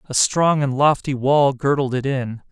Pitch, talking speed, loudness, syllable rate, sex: 135 Hz, 190 wpm, -19 LUFS, 4.3 syllables/s, male